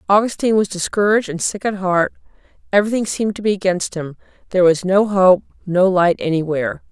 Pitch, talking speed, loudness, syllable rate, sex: 190 Hz, 175 wpm, -17 LUFS, 6.3 syllables/s, female